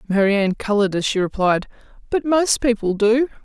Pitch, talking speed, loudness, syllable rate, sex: 220 Hz, 155 wpm, -19 LUFS, 5.5 syllables/s, female